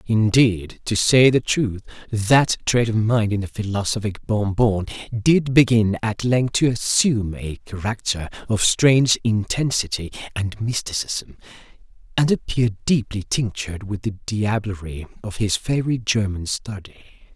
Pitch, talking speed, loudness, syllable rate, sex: 110 Hz, 135 wpm, -20 LUFS, 4.5 syllables/s, male